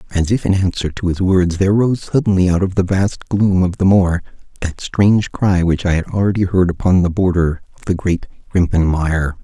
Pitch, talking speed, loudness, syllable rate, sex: 90 Hz, 215 wpm, -16 LUFS, 5.3 syllables/s, male